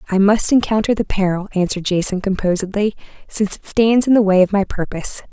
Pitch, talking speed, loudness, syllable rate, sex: 200 Hz, 190 wpm, -17 LUFS, 6.3 syllables/s, female